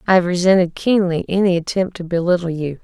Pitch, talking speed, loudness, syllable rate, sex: 180 Hz, 190 wpm, -17 LUFS, 6.0 syllables/s, female